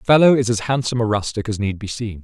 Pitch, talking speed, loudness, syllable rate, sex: 115 Hz, 295 wpm, -19 LUFS, 7.3 syllables/s, male